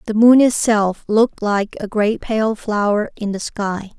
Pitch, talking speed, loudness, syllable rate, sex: 215 Hz, 180 wpm, -17 LUFS, 4.1 syllables/s, female